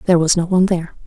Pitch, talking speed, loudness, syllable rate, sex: 175 Hz, 280 wpm, -16 LUFS, 8.5 syllables/s, female